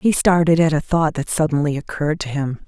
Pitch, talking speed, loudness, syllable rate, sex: 155 Hz, 225 wpm, -19 LUFS, 5.8 syllables/s, female